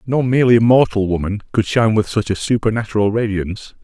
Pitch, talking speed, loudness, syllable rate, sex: 110 Hz, 170 wpm, -16 LUFS, 6.2 syllables/s, male